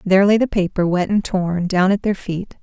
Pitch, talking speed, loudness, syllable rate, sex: 190 Hz, 250 wpm, -18 LUFS, 5.2 syllables/s, female